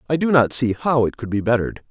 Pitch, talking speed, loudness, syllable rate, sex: 125 Hz, 285 wpm, -19 LUFS, 6.6 syllables/s, male